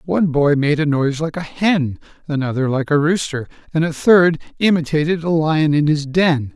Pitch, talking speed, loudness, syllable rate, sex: 155 Hz, 190 wpm, -17 LUFS, 5.1 syllables/s, male